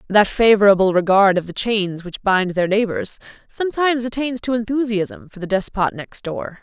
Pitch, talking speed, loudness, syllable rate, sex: 210 Hz, 170 wpm, -18 LUFS, 5.0 syllables/s, female